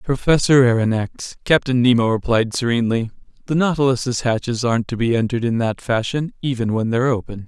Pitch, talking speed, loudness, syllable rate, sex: 120 Hz, 160 wpm, -19 LUFS, 5.9 syllables/s, male